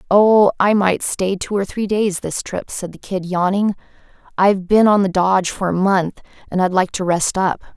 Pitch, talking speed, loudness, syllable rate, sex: 190 Hz, 215 wpm, -17 LUFS, 4.8 syllables/s, female